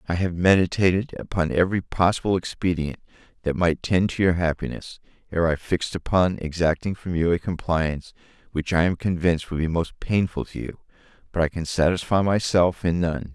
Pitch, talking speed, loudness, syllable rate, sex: 85 Hz, 175 wpm, -23 LUFS, 5.5 syllables/s, male